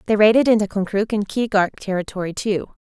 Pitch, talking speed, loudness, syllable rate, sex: 205 Hz, 170 wpm, -19 LUFS, 5.8 syllables/s, female